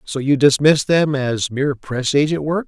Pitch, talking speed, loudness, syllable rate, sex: 140 Hz, 200 wpm, -17 LUFS, 5.1 syllables/s, male